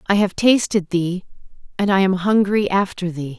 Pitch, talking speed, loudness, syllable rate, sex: 190 Hz, 175 wpm, -18 LUFS, 4.8 syllables/s, female